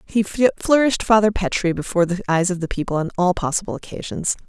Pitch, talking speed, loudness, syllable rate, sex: 190 Hz, 190 wpm, -20 LUFS, 6.9 syllables/s, female